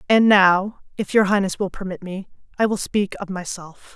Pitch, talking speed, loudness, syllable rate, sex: 195 Hz, 195 wpm, -20 LUFS, 4.9 syllables/s, female